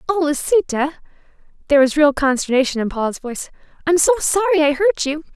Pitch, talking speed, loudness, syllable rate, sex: 305 Hz, 155 wpm, -17 LUFS, 6.1 syllables/s, female